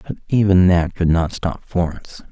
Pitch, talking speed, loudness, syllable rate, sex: 90 Hz, 180 wpm, -18 LUFS, 5.0 syllables/s, male